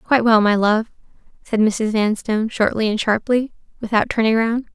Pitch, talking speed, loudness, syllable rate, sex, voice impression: 220 Hz, 165 wpm, -18 LUFS, 5.3 syllables/s, female, very feminine, very young, very thin, slightly relaxed, slightly weak, slightly dark, hard, clear, fluent, slightly raspy, very cute, slightly intellectual, sincere, friendly, reassuring, very unique, elegant, sweet, modest